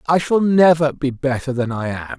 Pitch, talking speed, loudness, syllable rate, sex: 145 Hz, 220 wpm, -17 LUFS, 5.0 syllables/s, male